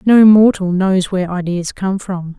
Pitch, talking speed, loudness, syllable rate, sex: 190 Hz, 175 wpm, -14 LUFS, 4.4 syllables/s, female